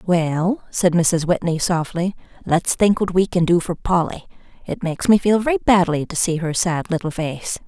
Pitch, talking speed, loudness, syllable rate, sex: 175 Hz, 195 wpm, -19 LUFS, 4.8 syllables/s, female